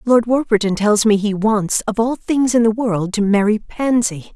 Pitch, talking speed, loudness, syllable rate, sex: 220 Hz, 205 wpm, -17 LUFS, 4.5 syllables/s, female